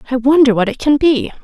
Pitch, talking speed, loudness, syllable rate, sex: 265 Hz, 250 wpm, -13 LUFS, 6.2 syllables/s, female